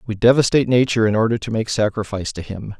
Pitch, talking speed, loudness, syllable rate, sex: 110 Hz, 215 wpm, -18 LUFS, 7.2 syllables/s, male